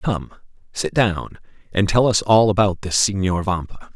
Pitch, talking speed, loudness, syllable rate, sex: 100 Hz, 165 wpm, -19 LUFS, 4.5 syllables/s, male